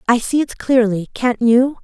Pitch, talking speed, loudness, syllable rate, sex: 240 Hz, 195 wpm, -16 LUFS, 4.4 syllables/s, female